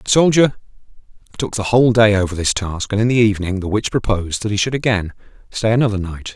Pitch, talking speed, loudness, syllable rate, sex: 105 Hz, 215 wpm, -17 LUFS, 6.4 syllables/s, male